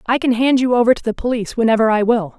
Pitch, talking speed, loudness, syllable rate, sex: 235 Hz, 275 wpm, -16 LUFS, 7.1 syllables/s, female